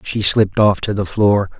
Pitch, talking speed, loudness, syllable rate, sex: 100 Hz, 225 wpm, -15 LUFS, 4.9 syllables/s, male